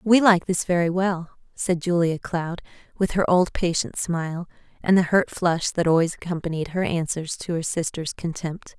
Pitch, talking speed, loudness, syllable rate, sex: 175 Hz, 180 wpm, -23 LUFS, 4.8 syllables/s, female